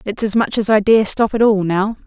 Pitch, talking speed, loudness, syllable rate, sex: 210 Hz, 290 wpm, -15 LUFS, 5.3 syllables/s, female